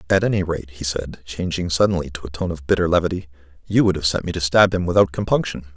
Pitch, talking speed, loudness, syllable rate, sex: 85 Hz, 240 wpm, -20 LUFS, 6.5 syllables/s, male